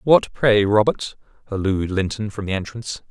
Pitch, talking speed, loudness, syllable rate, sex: 105 Hz, 155 wpm, -20 LUFS, 4.9 syllables/s, male